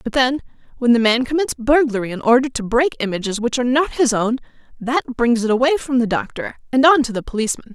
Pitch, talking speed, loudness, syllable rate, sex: 250 Hz, 225 wpm, -18 LUFS, 6.2 syllables/s, female